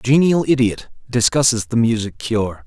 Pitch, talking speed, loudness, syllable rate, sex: 120 Hz, 155 wpm, -17 LUFS, 5.1 syllables/s, male